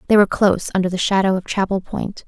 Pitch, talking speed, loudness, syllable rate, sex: 195 Hz, 235 wpm, -18 LUFS, 6.8 syllables/s, female